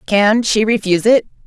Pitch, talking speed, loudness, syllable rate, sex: 210 Hz, 165 wpm, -14 LUFS, 5.1 syllables/s, female